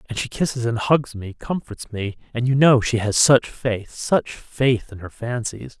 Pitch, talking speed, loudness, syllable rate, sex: 120 Hz, 205 wpm, -21 LUFS, 4.3 syllables/s, male